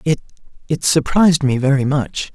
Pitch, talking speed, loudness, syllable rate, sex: 145 Hz, 130 wpm, -16 LUFS, 5.1 syllables/s, male